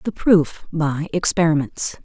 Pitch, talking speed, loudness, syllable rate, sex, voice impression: 160 Hz, 120 wpm, -19 LUFS, 4.0 syllables/s, female, feminine, adult-like, tensed, powerful, bright, soft, clear, fluent, intellectual, slightly refreshing, calm, friendly, reassuring, elegant, kind